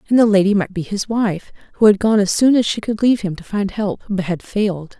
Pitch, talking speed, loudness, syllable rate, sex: 205 Hz, 275 wpm, -17 LUFS, 5.8 syllables/s, female